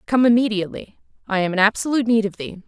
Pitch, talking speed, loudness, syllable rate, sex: 215 Hz, 200 wpm, -19 LUFS, 7.1 syllables/s, female